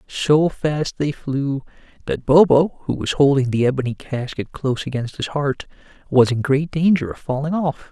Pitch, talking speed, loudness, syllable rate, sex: 140 Hz, 175 wpm, -19 LUFS, 4.7 syllables/s, male